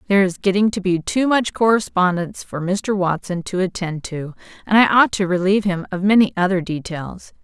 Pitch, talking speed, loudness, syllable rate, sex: 190 Hz, 195 wpm, -19 LUFS, 5.4 syllables/s, female